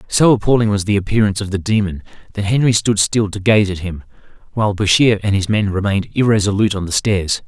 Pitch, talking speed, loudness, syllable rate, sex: 100 Hz, 210 wpm, -16 LUFS, 6.4 syllables/s, male